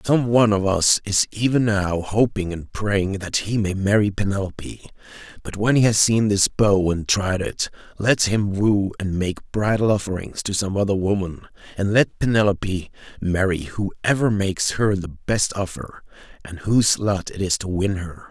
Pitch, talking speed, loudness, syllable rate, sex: 100 Hz, 175 wpm, -21 LUFS, 4.6 syllables/s, male